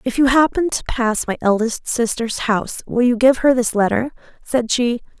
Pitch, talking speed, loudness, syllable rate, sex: 240 Hz, 195 wpm, -18 LUFS, 4.9 syllables/s, female